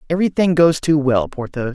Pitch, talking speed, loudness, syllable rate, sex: 150 Hz, 170 wpm, -17 LUFS, 5.7 syllables/s, male